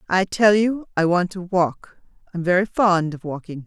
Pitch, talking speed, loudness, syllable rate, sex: 185 Hz, 195 wpm, -20 LUFS, 4.6 syllables/s, female